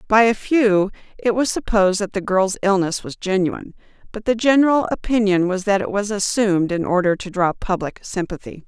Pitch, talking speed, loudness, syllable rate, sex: 200 Hz, 185 wpm, -19 LUFS, 5.5 syllables/s, female